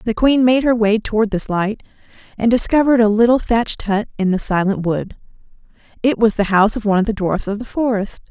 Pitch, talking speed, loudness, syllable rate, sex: 220 Hz, 215 wpm, -17 LUFS, 6.0 syllables/s, female